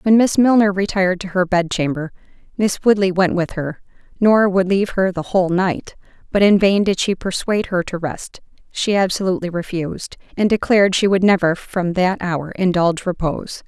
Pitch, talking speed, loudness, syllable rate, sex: 190 Hz, 175 wpm, -17 LUFS, 5.4 syllables/s, female